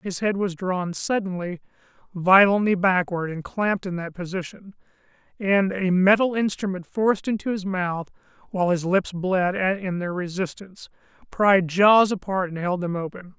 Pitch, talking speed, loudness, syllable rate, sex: 185 Hz, 150 wpm, -22 LUFS, 4.7 syllables/s, male